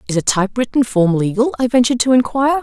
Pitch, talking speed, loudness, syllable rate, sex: 235 Hz, 205 wpm, -15 LUFS, 7.1 syllables/s, female